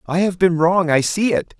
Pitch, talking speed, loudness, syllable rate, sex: 175 Hz, 265 wpm, -17 LUFS, 4.8 syllables/s, male